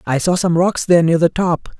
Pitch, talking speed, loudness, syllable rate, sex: 170 Hz, 265 wpm, -15 LUFS, 5.5 syllables/s, male